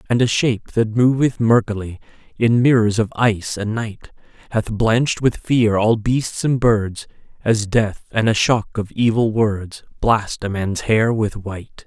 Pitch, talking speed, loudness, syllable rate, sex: 110 Hz, 170 wpm, -18 LUFS, 4.3 syllables/s, male